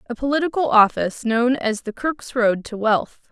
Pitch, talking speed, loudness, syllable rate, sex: 240 Hz, 180 wpm, -20 LUFS, 5.0 syllables/s, female